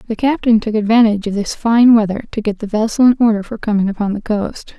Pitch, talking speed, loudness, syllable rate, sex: 220 Hz, 240 wpm, -15 LUFS, 6.2 syllables/s, female